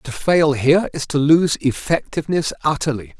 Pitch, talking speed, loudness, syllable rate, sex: 145 Hz, 150 wpm, -18 LUFS, 5.0 syllables/s, male